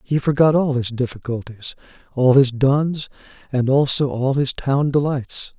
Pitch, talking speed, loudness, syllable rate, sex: 135 Hz, 150 wpm, -19 LUFS, 4.3 syllables/s, male